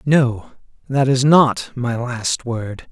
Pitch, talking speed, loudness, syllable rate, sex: 125 Hz, 145 wpm, -18 LUFS, 3.0 syllables/s, male